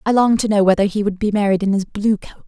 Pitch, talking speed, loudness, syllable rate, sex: 205 Hz, 315 wpm, -17 LUFS, 7.1 syllables/s, female